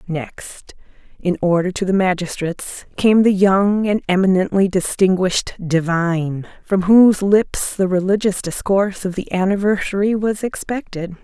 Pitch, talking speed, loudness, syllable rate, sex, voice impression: 190 Hz, 130 wpm, -17 LUFS, 4.6 syllables/s, female, feminine, very adult-like, slightly soft, calm, elegant, slightly sweet